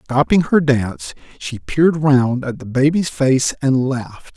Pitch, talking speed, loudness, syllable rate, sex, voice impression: 135 Hz, 165 wpm, -17 LUFS, 4.2 syllables/s, male, masculine, slightly old, thick, slightly soft, sincere, reassuring, elegant, slightly kind